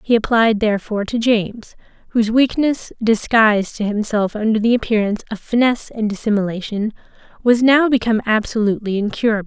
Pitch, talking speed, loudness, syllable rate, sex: 220 Hz, 140 wpm, -17 LUFS, 6.1 syllables/s, female